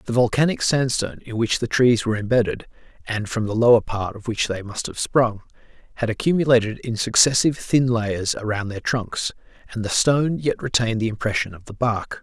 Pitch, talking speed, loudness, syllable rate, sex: 115 Hz, 190 wpm, -21 LUFS, 5.6 syllables/s, male